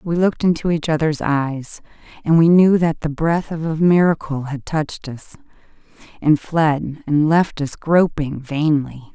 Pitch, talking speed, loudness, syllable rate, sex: 155 Hz, 165 wpm, -18 LUFS, 4.3 syllables/s, female